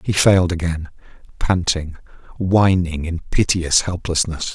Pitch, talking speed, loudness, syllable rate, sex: 90 Hz, 105 wpm, -19 LUFS, 4.2 syllables/s, male